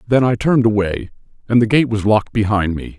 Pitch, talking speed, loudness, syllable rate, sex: 110 Hz, 220 wpm, -16 LUFS, 6.1 syllables/s, male